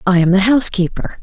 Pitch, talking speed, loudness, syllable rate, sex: 200 Hz, 195 wpm, -14 LUFS, 6.4 syllables/s, female